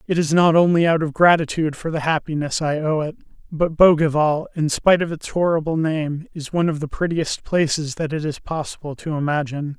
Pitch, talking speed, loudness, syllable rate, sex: 155 Hz, 200 wpm, -20 LUFS, 5.7 syllables/s, male